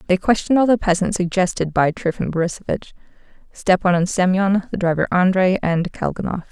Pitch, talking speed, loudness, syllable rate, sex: 185 Hz, 155 wpm, -19 LUFS, 5.6 syllables/s, female